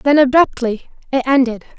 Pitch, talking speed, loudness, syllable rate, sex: 260 Hz, 135 wpm, -15 LUFS, 5.0 syllables/s, female